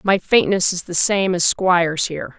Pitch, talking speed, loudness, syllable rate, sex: 180 Hz, 200 wpm, -17 LUFS, 4.8 syllables/s, female